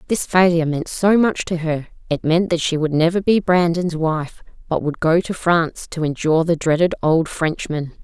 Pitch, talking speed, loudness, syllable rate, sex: 165 Hz, 200 wpm, -18 LUFS, 5.0 syllables/s, female